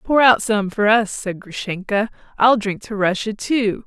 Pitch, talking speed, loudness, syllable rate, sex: 215 Hz, 185 wpm, -19 LUFS, 4.3 syllables/s, female